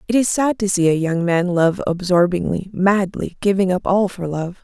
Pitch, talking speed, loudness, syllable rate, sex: 185 Hz, 205 wpm, -18 LUFS, 4.9 syllables/s, female